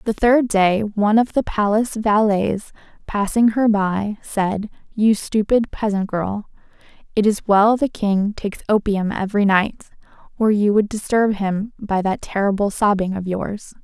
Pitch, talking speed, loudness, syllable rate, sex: 205 Hz, 155 wpm, -19 LUFS, 4.4 syllables/s, female